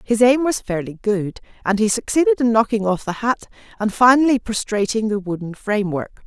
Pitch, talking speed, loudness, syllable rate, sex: 220 Hz, 180 wpm, -19 LUFS, 5.4 syllables/s, female